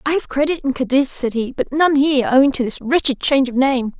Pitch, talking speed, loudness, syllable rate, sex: 270 Hz, 255 wpm, -17 LUFS, 6.1 syllables/s, female